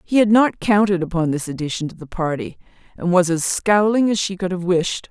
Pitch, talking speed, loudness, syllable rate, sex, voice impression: 185 Hz, 225 wpm, -19 LUFS, 5.4 syllables/s, female, feminine, adult-like, tensed, powerful, intellectual, reassuring, elegant, lively, strict, sharp